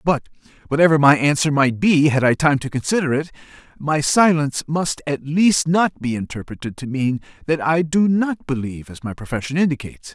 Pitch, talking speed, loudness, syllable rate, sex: 145 Hz, 185 wpm, -19 LUFS, 5.4 syllables/s, male